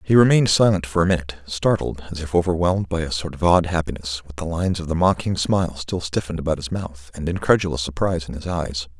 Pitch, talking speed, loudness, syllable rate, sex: 85 Hz, 225 wpm, -21 LUFS, 6.5 syllables/s, male